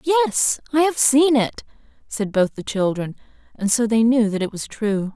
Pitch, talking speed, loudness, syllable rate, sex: 235 Hz, 200 wpm, -19 LUFS, 4.6 syllables/s, female